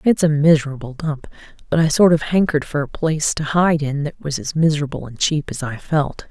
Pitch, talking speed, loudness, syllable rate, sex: 150 Hz, 230 wpm, -19 LUFS, 5.8 syllables/s, female